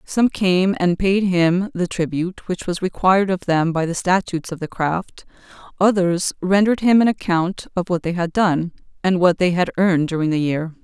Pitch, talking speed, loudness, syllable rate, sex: 180 Hz, 200 wpm, -19 LUFS, 5.0 syllables/s, female